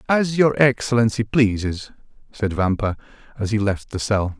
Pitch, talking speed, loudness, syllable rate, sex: 110 Hz, 150 wpm, -20 LUFS, 4.7 syllables/s, male